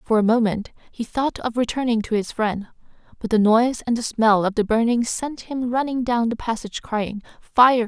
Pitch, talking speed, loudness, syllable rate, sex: 230 Hz, 205 wpm, -21 LUFS, 5.1 syllables/s, female